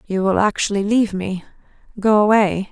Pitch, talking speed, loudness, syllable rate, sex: 205 Hz, 130 wpm, -18 LUFS, 5.5 syllables/s, female